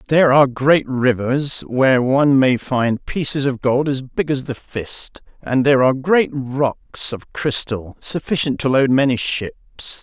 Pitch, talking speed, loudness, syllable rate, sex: 135 Hz, 170 wpm, -18 LUFS, 4.2 syllables/s, male